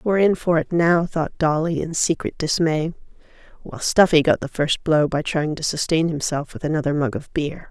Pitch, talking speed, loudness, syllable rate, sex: 155 Hz, 200 wpm, -20 LUFS, 5.3 syllables/s, female